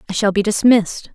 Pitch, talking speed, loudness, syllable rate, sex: 205 Hz, 210 wpm, -15 LUFS, 6.5 syllables/s, female